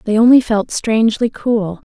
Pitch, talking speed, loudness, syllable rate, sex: 225 Hz, 155 wpm, -14 LUFS, 4.7 syllables/s, female